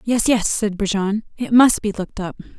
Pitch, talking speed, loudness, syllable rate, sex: 210 Hz, 210 wpm, -18 LUFS, 5.1 syllables/s, female